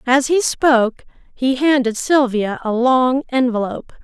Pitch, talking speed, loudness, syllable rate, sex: 255 Hz, 135 wpm, -17 LUFS, 4.5 syllables/s, female